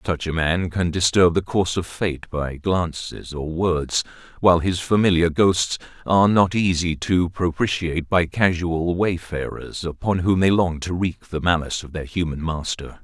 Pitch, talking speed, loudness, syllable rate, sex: 85 Hz, 170 wpm, -21 LUFS, 4.6 syllables/s, male